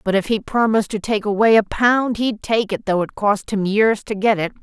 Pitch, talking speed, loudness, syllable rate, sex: 210 Hz, 260 wpm, -18 LUFS, 5.2 syllables/s, female